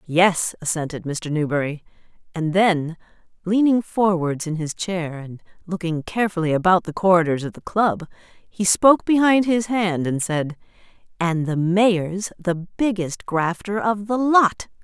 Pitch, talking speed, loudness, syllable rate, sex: 180 Hz, 145 wpm, -21 LUFS, 4.3 syllables/s, female